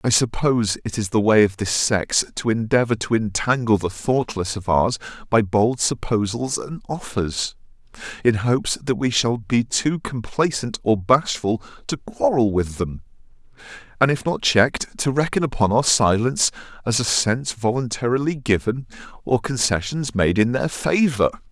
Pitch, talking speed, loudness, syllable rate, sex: 120 Hz, 155 wpm, -21 LUFS, 4.6 syllables/s, male